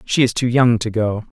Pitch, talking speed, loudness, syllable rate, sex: 115 Hz, 260 wpm, -17 LUFS, 5.1 syllables/s, male